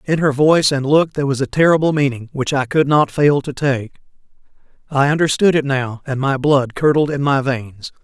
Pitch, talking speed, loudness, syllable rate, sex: 140 Hz, 210 wpm, -16 LUFS, 5.2 syllables/s, male